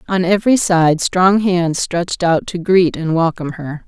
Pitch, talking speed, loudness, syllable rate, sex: 175 Hz, 185 wpm, -15 LUFS, 4.6 syllables/s, female